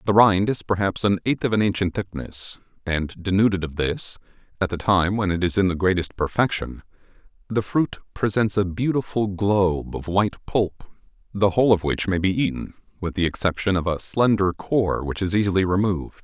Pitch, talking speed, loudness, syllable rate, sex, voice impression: 95 Hz, 190 wpm, -22 LUFS, 5.4 syllables/s, male, masculine, middle-aged, thick, tensed, powerful, hard, slightly muffled, fluent, cool, intellectual, calm, mature, friendly, reassuring, wild, lively, slightly strict